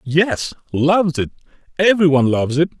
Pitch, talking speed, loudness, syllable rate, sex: 155 Hz, 150 wpm, -17 LUFS, 6.0 syllables/s, male